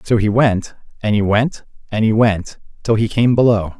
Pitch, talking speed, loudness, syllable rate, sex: 110 Hz, 205 wpm, -16 LUFS, 4.7 syllables/s, male